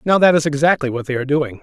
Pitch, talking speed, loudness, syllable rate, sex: 145 Hz, 295 wpm, -17 LUFS, 7.2 syllables/s, male